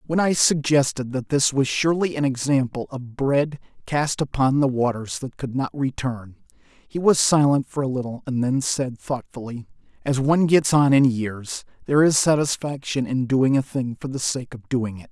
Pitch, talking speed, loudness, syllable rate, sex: 135 Hz, 190 wpm, -22 LUFS, 4.8 syllables/s, male